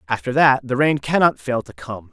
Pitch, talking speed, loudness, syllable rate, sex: 130 Hz, 225 wpm, -18 LUFS, 5.1 syllables/s, male